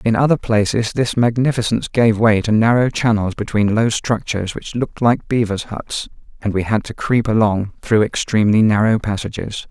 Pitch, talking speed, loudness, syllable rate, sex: 110 Hz, 175 wpm, -17 LUFS, 5.2 syllables/s, male